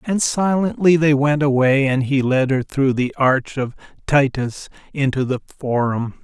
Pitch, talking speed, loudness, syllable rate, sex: 135 Hz, 165 wpm, -18 LUFS, 4.3 syllables/s, male